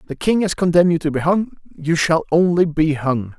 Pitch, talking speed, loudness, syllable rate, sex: 165 Hz, 230 wpm, -17 LUFS, 5.3 syllables/s, male